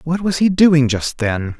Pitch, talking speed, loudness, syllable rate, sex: 150 Hz, 225 wpm, -16 LUFS, 4.0 syllables/s, male